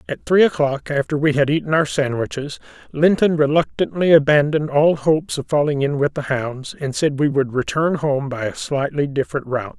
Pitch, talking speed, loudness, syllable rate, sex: 145 Hz, 190 wpm, -19 LUFS, 5.4 syllables/s, male